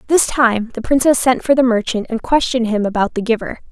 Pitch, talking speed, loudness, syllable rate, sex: 235 Hz, 225 wpm, -16 LUFS, 5.9 syllables/s, female